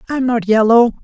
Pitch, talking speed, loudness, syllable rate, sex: 235 Hz, 175 wpm, -13 LUFS, 5.4 syllables/s, male